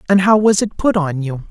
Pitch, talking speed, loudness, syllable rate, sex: 185 Hz, 280 wpm, -15 LUFS, 5.3 syllables/s, male